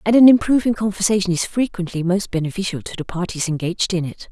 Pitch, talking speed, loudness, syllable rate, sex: 190 Hz, 195 wpm, -19 LUFS, 6.5 syllables/s, female